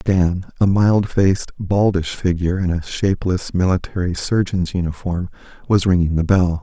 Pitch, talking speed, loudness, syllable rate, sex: 90 Hz, 145 wpm, -19 LUFS, 4.8 syllables/s, male